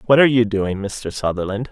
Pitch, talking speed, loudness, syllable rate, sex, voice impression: 110 Hz, 210 wpm, -19 LUFS, 5.8 syllables/s, male, very masculine, very adult-like, cool, calm, elegant